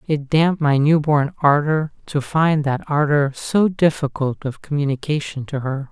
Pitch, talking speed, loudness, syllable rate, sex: 145 Hz, 160 wpm, -19 LUFS, 4.6 syllables/s, male